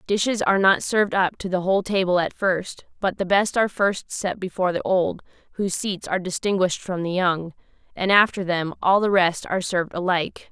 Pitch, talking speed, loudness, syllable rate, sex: 185 Hz, 205 wpm, -22 LUFS, 5.8 syllables/s, female